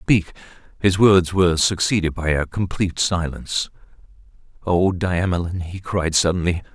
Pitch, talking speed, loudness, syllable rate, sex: 90 Hz, 125 wpm, -20 LUFS, 4.8 syllables/s, male